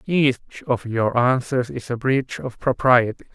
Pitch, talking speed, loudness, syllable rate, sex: 130 Hz, 160 wpm, -21 LUFS, 4.2 syllables/s, male